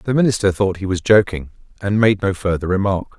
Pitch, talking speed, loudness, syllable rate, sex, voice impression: 100 Hz, 205 wpm, -18 LUFS, 5.6 syllables/s, male, masculine, adult-like, slightly thick, cool, slightly sincere, slightly wild